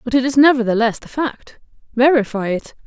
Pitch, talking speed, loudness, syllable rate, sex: 245 Hz, 165 wpm, -17 LUFS, 5.5 syllables/s, female